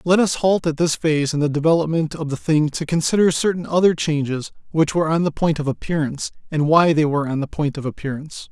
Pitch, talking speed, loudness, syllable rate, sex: 155 Hz, 230 wpm, -20 LUFS, 6.3 syllables/s, male